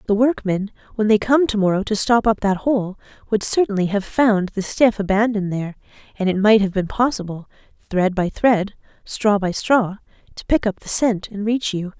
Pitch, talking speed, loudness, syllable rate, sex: 210 Hz, 200 wpm, -19 LUFS, 5.1 syllables/s, female